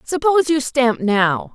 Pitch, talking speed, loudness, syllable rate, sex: 260 Hz, 155 wpm, -17 LUFS, 4.1 syllables/s, female